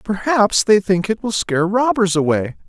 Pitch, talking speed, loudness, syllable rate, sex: 195 Hz, 180 wpm, -17 LUFS, 4.8 syllables/s, male